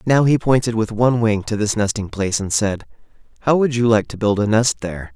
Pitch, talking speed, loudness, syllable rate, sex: 110 Hz, 245 wpm, -18 LUFS, 5.9 syllables/s, male